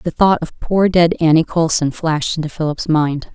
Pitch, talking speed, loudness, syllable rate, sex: 160 Hz, 195 wpm, -16 LUFS, 5.0 syllables/s, female